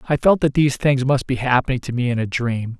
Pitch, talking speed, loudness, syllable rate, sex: 130 Hz, 280 wpm, -19 LUFS, 6.1 syllables/s, male